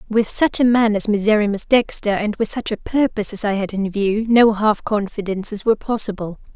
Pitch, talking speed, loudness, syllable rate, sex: 210 Hz, 200 wpm, -18 LUFS, 5.5 syllables/s, female